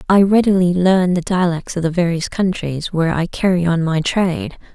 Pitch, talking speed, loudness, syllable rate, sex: 175 Hz, 190 wpm, -17 LUFS, 5.2 syllables/s, female